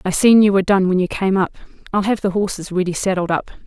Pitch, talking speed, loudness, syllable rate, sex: 190 Hz, 260 wpm, -17 LUFS, 6.4 syllables/s, female